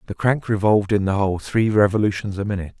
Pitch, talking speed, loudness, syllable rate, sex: 100 Hz, 215 wpm, -20 LUFS, 6.6 syllables/s, male